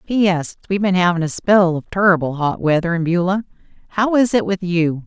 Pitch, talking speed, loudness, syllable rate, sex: 180 Hz, 215 wpm, -17 LUFS, 5.7 syllables/s, female